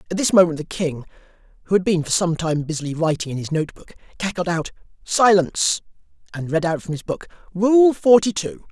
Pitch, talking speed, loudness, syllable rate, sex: 180 Hz, 200 wpm, -20 LUFS, 5.7 syllables/s, male